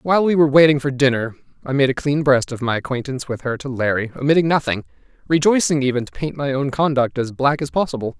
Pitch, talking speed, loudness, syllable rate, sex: 135 Hz, 220 wpm, -19 LUFS, 6.5 syllables/s, male